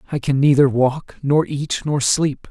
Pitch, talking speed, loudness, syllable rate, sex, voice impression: 140 Hz, 190 wpm, -18 LUFS, 4.1 syllables/s, male, masculine, adult-like, slightly thick, slightly refreshing, sincere, friendly